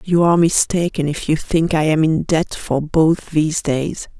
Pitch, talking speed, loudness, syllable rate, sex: 160 Hz, 200 wpm, -17 LUFS, 4.5 syllables/s, female